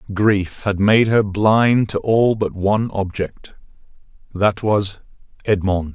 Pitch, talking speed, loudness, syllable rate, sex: 100 Hz, 120 wpm, -18 LUFS, 3.6 syllables/s, male